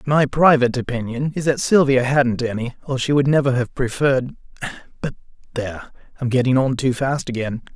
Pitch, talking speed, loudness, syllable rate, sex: 130 Hz, 160 wpm, -19 LUFS, 5.6 syllables/s, male